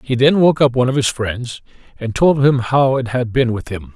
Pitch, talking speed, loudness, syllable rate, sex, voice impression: 125 Hz, 260 wpm, -16 LUFS, 5.1 syllables/s, male, very masculine, very adult-like, thick, cool, slightly calm, slightly wild